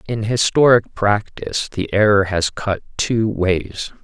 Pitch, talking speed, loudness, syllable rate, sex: 105 Hz, 135 wpm, -18 LUFS, 3.7 syllables/s, male